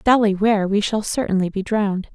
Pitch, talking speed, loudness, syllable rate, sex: 205 Hz, 195 wpm, -19 LUFS, 5.5 syllables/s, female